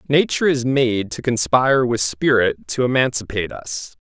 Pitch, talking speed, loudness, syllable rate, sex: 120 Hz, 150 wpm, -19 LUFS, 5.0 syllables/s, male